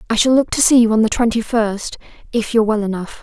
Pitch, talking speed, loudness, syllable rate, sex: 225 Hz, 260 wpm, -16 LUFS, 6.3 syllables/s, female